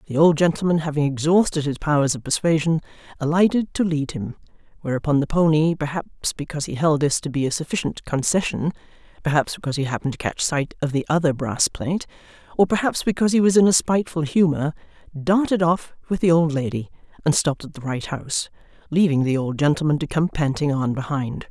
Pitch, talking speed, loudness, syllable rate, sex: 155 Hz, 190 wpm, -21 LUFS, 6.1 syllables/s, female